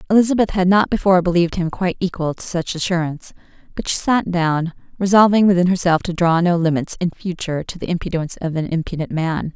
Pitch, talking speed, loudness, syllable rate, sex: 175 Hz, 195 wpm, -18 LUFS, 6.5 syllables/s, female